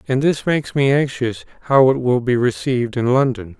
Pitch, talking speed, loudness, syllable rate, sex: 130 Hz, 200 wpm, -18 LUFS, 5.3 syllables/s, male